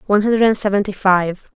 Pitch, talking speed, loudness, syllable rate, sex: 200 Hz, 155 wpm, -16 LUFS, 5.8 syllables/s, female